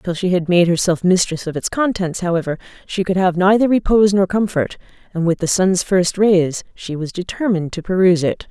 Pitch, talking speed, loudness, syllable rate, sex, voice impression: 180 Hz, 205 wpm, -17 LUFS, 5.6 syllables/s, female, very feminine, adult-like, slightly middle-aged, slightly thin, tensed, slightly weak, slightly dark, slightly soft, slightly muffled, fluent, slightly cool, very intellectual, refreshing, sincere, slightly calm, slightly friendly, slightly reassuring, unique, elegant, slightly wild, slightly sweet, lively, slightly strict, slightly intense, slightly sharp